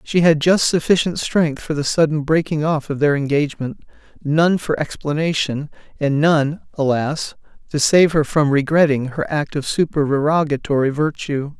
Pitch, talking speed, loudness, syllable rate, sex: 150 Hz, 150 wpm, -18 LUFS, 4.7 syllables/s, male